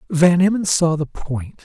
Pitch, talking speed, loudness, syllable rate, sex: 165 Hz, 185 wpm, -18 LUFS, 4.2 syllables/s, male